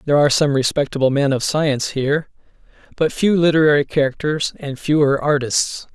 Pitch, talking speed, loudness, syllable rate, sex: 145 Hz, 150 wpm, -18 LUFS, 5.7 syllables/s, male